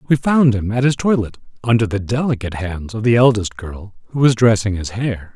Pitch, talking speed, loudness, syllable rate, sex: 115 Hz, 215 wpm, -17 LUFS, 5.5 syllables/s, male